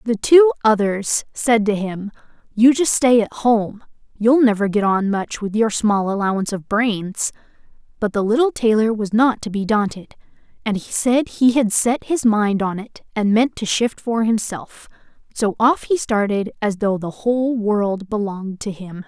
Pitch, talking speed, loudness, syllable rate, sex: 220 Hz, 180 wpm, -18 LUFS, 4.4 syllables/s, female